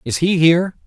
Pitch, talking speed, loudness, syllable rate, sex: 160 Hz, 210 wpm, -15 LUFS, 5.6 syllables/s, male